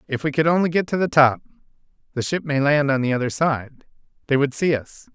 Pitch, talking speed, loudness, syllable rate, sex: 145 Hz, 210 wpm, -20 LUFS, 5.8 syllables/s, male